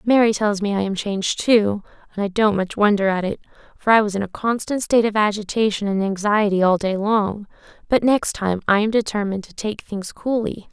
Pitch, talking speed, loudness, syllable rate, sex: 205 Hz, 215 wpm, -20 LUFS, 5.5 syllables/s, female